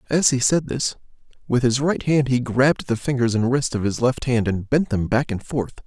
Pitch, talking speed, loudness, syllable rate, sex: 125 Hz, 245 wpm, -21 LUFS, 5.2 syllables/s, male